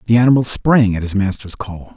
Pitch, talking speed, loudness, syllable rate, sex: 110 Hz, 215 wpm, -15 LUFS, 5.7 syllables/s, male